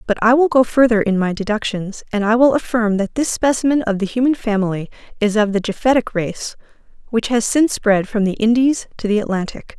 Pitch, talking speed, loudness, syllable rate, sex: 225 Hz, 210 wpm, -17 LUFS, 5.7 syllables/s, female